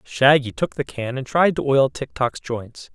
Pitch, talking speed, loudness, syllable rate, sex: 130 Hz, 225 wpm, -21 LUFS, 4.2 syllables/s, male